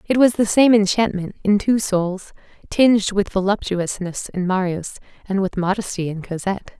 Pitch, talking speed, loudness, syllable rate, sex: 195 Hz, 160 wpm, -19 LUFS, 4.9 syllables/s, female